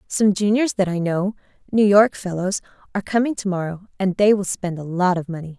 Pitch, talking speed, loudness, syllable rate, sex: 190 Hz, 205 wpm, -20 LUFS, 5.6 syllables/s, female